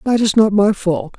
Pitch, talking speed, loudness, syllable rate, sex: 200 Hz, 250 wpm, -15 LUFS, 4.7 syllables/s, male